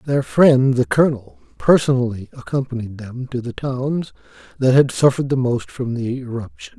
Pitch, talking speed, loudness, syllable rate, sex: 130 Hz, 160 wpm, -19 LUFS, 5.1 syllables/s, male